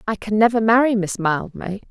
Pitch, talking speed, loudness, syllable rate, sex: 215 Hz, 190 wpm, -18 LUFS, 5.3 syllables/s, female